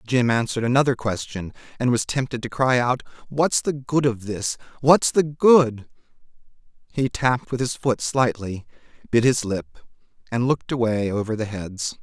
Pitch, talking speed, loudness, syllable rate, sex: 120 Hz, 165 wpm, -22 LUFS, 4.8 syllables/s, male